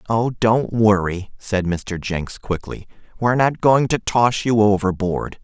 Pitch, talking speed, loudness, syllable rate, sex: 105 Hz, 155 wpm, -19 LUFS, 3.9 syllables/s, male